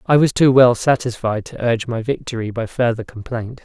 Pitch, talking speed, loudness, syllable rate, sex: 120 Hz, 200 wpm, -18 LUFS, 5.5 syllables/s, male